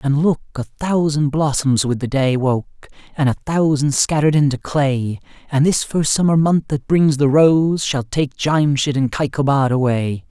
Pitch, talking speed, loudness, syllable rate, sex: 140 Hz, 165 wpm, -17 LUFS, 4.3 syllables/s, male